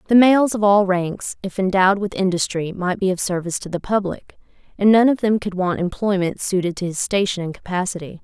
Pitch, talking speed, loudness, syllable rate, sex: 190 Hz, 210 wpm, -19 LUFS, 5.7 syllables/s, female